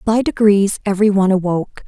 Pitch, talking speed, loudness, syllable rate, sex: 200 Hz, 160 wpm, -15 LUFS, 7.0 syllables/s, female